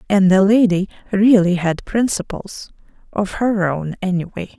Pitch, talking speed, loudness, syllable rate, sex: 195 Hz, 120 wpm, -17 LUFS, 4.4 syllables/s, female